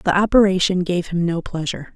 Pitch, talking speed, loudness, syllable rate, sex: 180 Hz, 185 wpm, -19 LUFS, 6.0 syllables/s, female